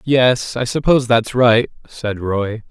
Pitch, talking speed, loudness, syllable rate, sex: 120 Hz, 155 wpm, -16 LUFS, 3.8 syllables/s, male